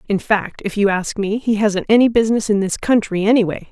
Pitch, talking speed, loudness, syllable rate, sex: 210 Hz, 225 wpm, -17 LUFS, 5.8 syllables/s, female